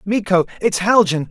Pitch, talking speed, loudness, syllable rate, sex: 195 Hz, 140 wpm, -16 LUFS, 4.8 syllables/s, male